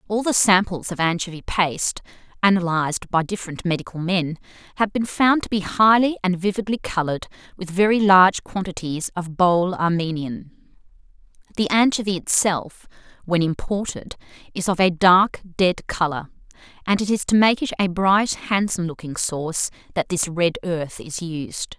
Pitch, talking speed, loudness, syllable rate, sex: 185 Hz, 150 wpm, -21 LUFS, 4.9 syllables/s, female